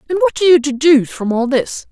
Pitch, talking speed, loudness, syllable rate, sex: 275 Hz, 250 wpm, -14 LUFS, 6.0 syllables/s, female